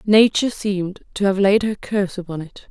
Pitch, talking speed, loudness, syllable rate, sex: 195 Hz, 200 wpm, -19 LUFS, 5.7 syllables/s, female